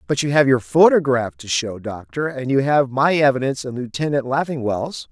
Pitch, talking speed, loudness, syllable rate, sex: 135 Hz, 190 wpm, -19 LUFS, 5.3 syllables/s, male